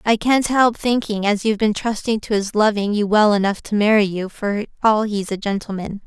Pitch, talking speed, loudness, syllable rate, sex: 210 Hz, 220 wpm, -19 LUFS, 5.2 syllables/s, female